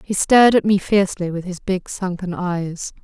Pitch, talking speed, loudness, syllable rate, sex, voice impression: 185 Hz, 200 wpm, -18 LUFS, 4.9 syllables/s, female, very feminine, very adult-like, middle-aged, slightly thin, slightly tensed, slightly powerful, slightly dark, slightly soft, slightly clear, fluent, slightly cute, intellectual, very refreshing, sincere, calm, friendly, very reassuring, slightly unique, elegant, slightly wild, sweet, lively, kind, slightly modest